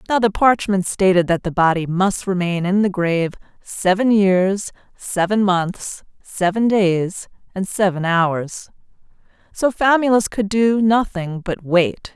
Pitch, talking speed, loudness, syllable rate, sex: 195 Hz, 140 wpm, -18 LUFS, 3.9 syllables/s, female